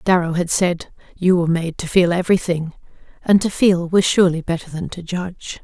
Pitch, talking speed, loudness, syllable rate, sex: 175 Hz, 190 wpm, -18 LUFS, 5.6 syllables/s, female